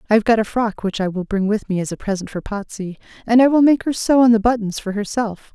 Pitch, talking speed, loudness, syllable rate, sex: 215 Hz, 290 wpm, -18 LUFS, 6.1 syllables/s, female